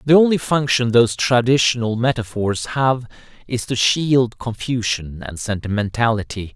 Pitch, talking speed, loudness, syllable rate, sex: 120 Hz, 120 wpm, -19 LUFS, 4.6 syllables/s, male